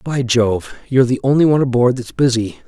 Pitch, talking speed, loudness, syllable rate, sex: 125 Hz, 200 wpm, -16 LUFS, 5.9 syllables/s, male